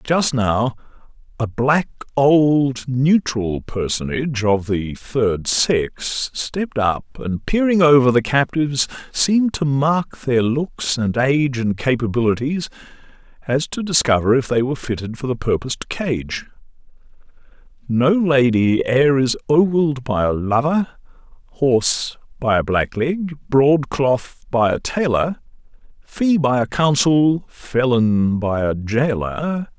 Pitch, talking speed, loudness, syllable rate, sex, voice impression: 130 Hz, 125 wpm, -18 LUFS, 3.8 syllables/s, male, masculine, middle-aged, tensed, powerful, bright, soft, cool, intellectual, calm, slightly mature, friendly, reassuring, wild, kind